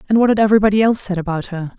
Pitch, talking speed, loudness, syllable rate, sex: 200 Hz, 270 wpm, -16 LUFS, 8.9 syllables/s, female